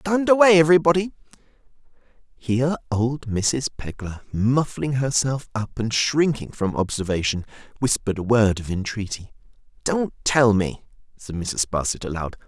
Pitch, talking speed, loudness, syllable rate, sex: 125 Hz, 125 wpm, -22 LUFS, 4.8 syllables/s, male